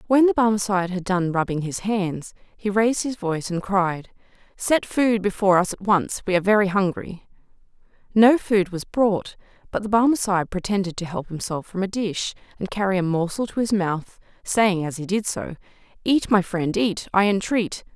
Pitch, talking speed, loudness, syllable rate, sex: 195 Hz, 185 wpm, -22 LUFS, 5.1 syllables/s, female